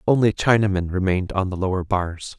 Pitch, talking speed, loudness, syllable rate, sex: 95 Hz, 175 wpm, -21 LUFS, 5.8 syllables/s, male